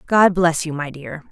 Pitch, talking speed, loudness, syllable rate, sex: 165 Hz, 230 wpm, -18 LUFS, 4.5 syllables/s, female